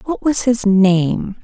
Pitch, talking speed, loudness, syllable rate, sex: 215 Hz, 170 wpm, -15 LUFS, 3.2 syllables/s, female